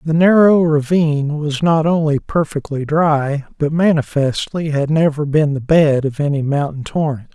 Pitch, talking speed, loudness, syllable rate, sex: 150 Hz, 155 wpm, -16 LUFS, 4.5 syllables/s, male